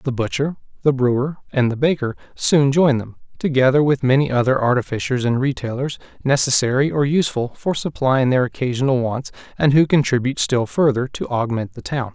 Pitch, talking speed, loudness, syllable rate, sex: 130 Hz, 170 wpm, -19 LUFS, 5.6 syllables/s, male